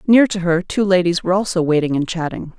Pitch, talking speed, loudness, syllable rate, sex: 180 Hz, 230 wpm, -17 LUFS, 6.3 syllables/s, female